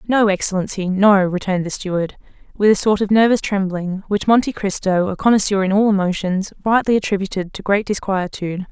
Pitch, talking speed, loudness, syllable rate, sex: 195 Hz, 170 wpm, -18 LUFS, 5.7 syllables/s, female